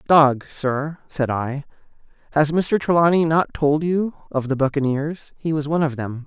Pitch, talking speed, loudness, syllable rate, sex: 150 Hz, 170 wpm, -21 LUFS, 4.7 syllables/s, male